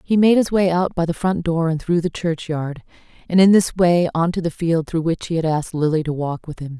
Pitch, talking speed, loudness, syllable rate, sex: 165 Hz, 275 wpm, -19 LUFS, 5.4 syllables/s, female